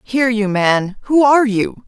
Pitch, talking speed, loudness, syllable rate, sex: 230 Hz, 190 wpm, -15 LUFS, 4.8 syllables/s, female